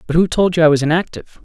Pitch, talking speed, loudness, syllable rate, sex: 165 Hz, 290 wpm, -15 LUFS, 7.8 syllables/s, male